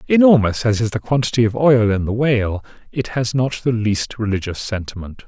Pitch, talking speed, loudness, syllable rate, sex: 115 Hz, 195 wpm, -18 LUFS, 5.4 syllables/s, male